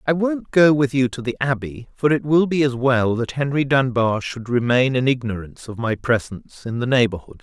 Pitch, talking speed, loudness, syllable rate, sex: 130 Hz, 220 wpm, -20 LUFS, 5.3 syllables/s, male